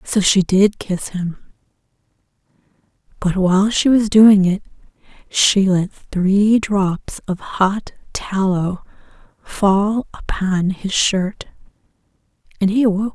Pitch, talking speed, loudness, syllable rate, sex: 195 Hz, 115 wpm, -17 LUFS, 3.4 syllables/s, female